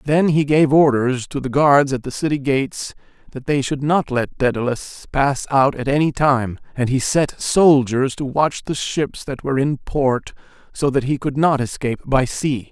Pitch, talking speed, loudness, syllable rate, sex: 135 Hz, 200 wpm, -18 LUFS, 4.5 syllables/s, male